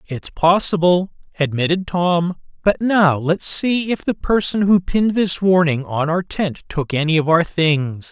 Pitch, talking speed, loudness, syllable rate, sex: 170 Hz, 170 wpm, -18 LUFS, 4.2 syllables/s, male